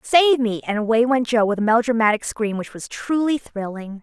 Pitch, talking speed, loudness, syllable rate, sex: 230 Hz, 210 wpm, -20 LUFS, 5.4 syllables/s, female